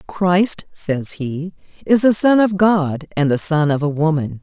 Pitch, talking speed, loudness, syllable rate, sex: 170 Hz, 190 wpm, -17 LUFS, 3.9 syllables/s, female